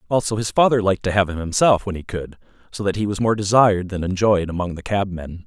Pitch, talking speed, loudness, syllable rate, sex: 100 Hz, 240 wpm, -20 LUFS, 6.3 syllables/s, male